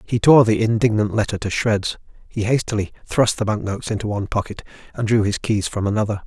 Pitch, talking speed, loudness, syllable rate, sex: 105 Hz, 210 wpm, -20 LUFS, 6.1 syllables/s, male